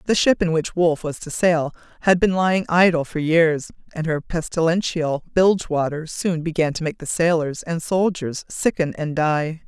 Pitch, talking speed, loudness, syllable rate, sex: 165 Hz, 185 wpm, -21 LUFS, 4.8 syllables/s, female